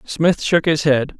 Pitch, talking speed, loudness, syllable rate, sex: 155 Hz, 200 wpm, -17 LUFS, 3.7 syllables/s, male